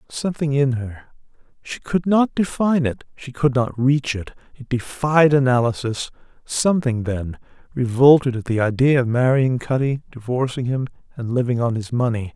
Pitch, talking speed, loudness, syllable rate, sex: 130 Hz, 145 wpm, -20 LUFS, 5.0 syllables/s, male